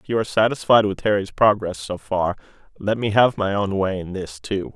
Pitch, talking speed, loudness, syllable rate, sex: 100 Hz, 225 wpm, -21 LUFS, 5.5 syllables/s, male